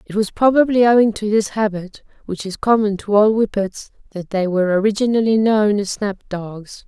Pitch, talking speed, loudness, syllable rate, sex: 210 Hz, 185 wpm, -17 LUFS, 5.1 syllables/s, female